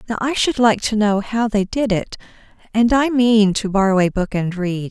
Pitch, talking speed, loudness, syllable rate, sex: 210 Hz, 235 wpm, -17 LUFS, 4.8 syllables/s, female